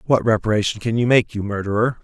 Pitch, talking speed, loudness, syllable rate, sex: 110 Hz, 205 wpm, -19 LUFS, 6.4 syllables/s, male